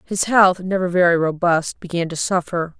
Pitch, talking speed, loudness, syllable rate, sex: 175 Hz, 170 wpm, -18 LUFS, 4.8 syllables/s, female